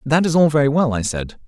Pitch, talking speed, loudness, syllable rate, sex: 140 Hz, 285 wpm, -17 LUFS, 6.1 syllables/s, male